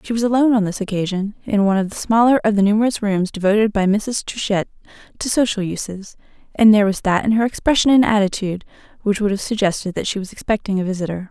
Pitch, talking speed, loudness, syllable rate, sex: 205 Hz, 220 wpm, -18 LUFS, 6.7 syllables/s, female